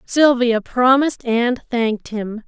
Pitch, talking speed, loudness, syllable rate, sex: 240 Hz, 120 wpm, -17 LUFS, 3.9 syllables/s, female